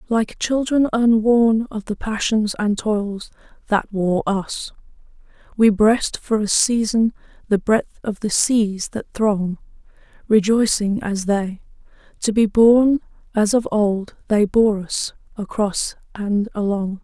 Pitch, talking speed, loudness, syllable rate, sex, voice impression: 215 Hz, 135 wpm, -19 LUFS, 3.6 syllables/s, female, feminine, very adult-like, muffled, very calm, unique, slightly kind